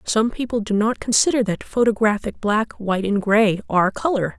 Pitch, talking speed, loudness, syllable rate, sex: 215 Hz, 180 wpm, -20 LUFS, 5.3 syllables/s, female